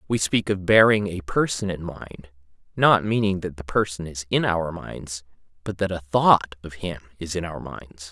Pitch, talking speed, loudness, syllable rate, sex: 90 Hz, 200 wpm, -23 LUFS, 4.5 syllables/s, male